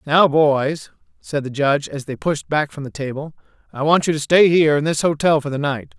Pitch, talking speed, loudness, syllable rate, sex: 150 Hz, 240 wpm, -18 LUFS, 5.4 syllables/s, male